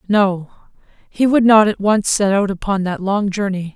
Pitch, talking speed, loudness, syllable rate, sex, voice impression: 200 Hz, 190 wpm, -16 LUFS, 4.6 syllables/s, female, feminine, adult-like, sincere, slightly calm